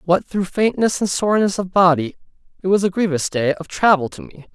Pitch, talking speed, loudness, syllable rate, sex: 185 Hz, 210 wpm, -18 LUFS, 5.6 syllables/s, male